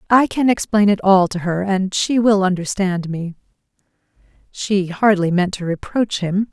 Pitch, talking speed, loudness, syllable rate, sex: 195 Hz, 165 wpm, -17 LUFS, 4.5 syllables/s, female